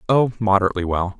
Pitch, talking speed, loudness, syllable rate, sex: 105 Hz, 150 wpm, -19 LUFS, 7.6 syllables/s, male